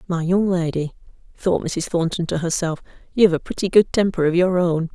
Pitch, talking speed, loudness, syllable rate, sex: 175 Hz, 195 wpm, -20 LUFS, 5.4 syllables/s, female